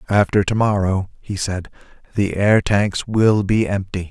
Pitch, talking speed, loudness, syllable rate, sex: 100 Hz, 145 wpm, -19 LUFS, 4.2 syllables/s, male